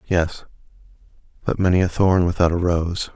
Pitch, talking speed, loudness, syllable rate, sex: 85 Hz, 150 wpm, -20 LUFS, 5.0 syllables/s, male